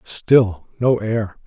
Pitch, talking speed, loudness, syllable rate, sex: 110 Hz, 125 wpm, -18 LUFS, 2.5 syllables/s, male